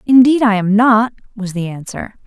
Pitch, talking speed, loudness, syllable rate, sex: 220 Hz, 185 wpm, -14 LUFS, 4.9 syllables/s, female